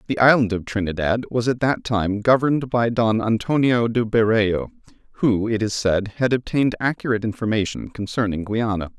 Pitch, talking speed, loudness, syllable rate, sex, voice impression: 115 Hz, 160 wpm, -21 LUFS, 5.3 syllables/s, male, masculine, middle-aged, tensed, slightly powerful, slightly bright, clear, fluent, intellectual, calm, friendly, slightly wild, kind